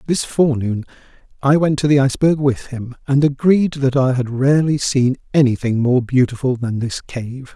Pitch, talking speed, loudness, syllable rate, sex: 135 Hz, 185 wpm, -17 LUFS, 4.9 syllables/s, male